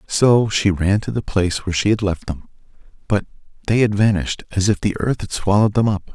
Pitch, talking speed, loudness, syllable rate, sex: 100 Hz, 225 wpm, -18 LUFS, 6.0 syllables/s, male